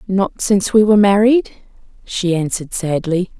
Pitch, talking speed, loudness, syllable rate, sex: 195 Hz, 140 wpm, -15 LUFS, 5.0 syllables/s, female